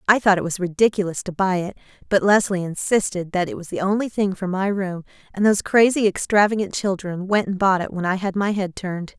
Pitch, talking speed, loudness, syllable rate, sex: 190 Hz, 230 wpm, -21 LUFS, 5.8 syllables/s, female